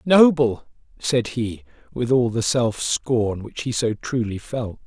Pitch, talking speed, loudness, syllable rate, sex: 120 Hz, 160 wpm, -22 LUFS, 3.7 syllables/s, male